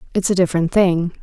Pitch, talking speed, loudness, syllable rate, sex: 180 Hz, 195 wpm, -17 LUFS, 6.7 syllables/s, female